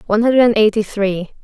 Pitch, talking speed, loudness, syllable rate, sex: 215 Hz, 165 wpm, -15 LUFS, 6.0 syllables/s, female